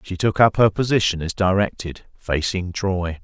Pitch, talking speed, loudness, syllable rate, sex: 95 Hz, 165 wpm, -20 LUFS, 4.6 syllables/s, male